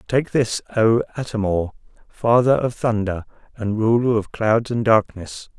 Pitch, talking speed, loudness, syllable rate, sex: 110 Hz, 150 wpm, -20 LUFS, 4.3 syllables/s, male